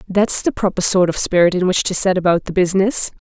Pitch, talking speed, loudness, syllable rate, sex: 190 Hz, 240 wpm, -16 LUFS, 6.0 syllables/s, female